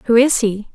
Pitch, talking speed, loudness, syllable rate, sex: 230 Hz, 240 wpm, -15 LUFS, 4.2 syllables/s, female